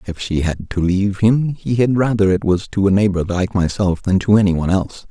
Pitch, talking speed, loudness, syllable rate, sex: 100 Hz, 235 wpm, -17 LUFS, 5.4 syllables/s, male